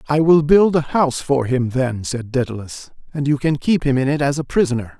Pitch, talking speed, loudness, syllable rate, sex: 140 Hz, 240 wpm, -18 LUFS, 5.5 syllables/s, male